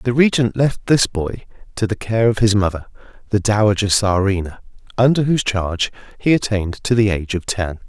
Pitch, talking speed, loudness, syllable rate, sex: 105 Hz, 185 wpm, -18 LUFS, 5.6 syllables/s, male